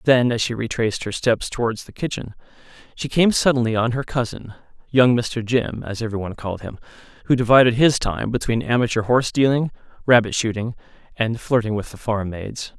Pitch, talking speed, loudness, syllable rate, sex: 120 Hz, 185 wpm, -20 LUFS, 5.8 syllables/s, male